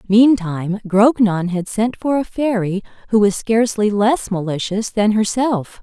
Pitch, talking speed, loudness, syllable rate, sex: 210 Hz, 145 wpm, -17 LUFS, 4.3 syllables/s, female